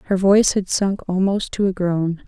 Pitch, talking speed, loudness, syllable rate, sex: 190 Hz, 210 wpm, -19 LUFS, 5.0 syllables/s, female